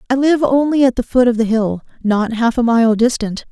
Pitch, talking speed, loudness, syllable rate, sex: 240 Hz, 240 wpm, -15 LUFS, 5.2 syllables/s, female